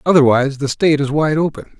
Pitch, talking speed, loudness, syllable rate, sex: 145 Hz, 200 wpm, -15 LUFS, 7.0 syllables/s, male